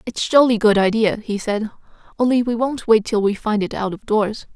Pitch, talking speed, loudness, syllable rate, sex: 220 Hz, 225 wpm, -18 LUFS, 5.1 syllables/s, female